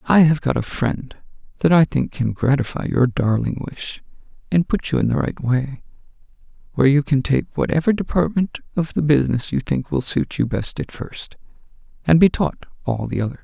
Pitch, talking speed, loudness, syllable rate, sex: 140 Hz, 190 wpm, -20 LUFS, 5.1 syllables/s, male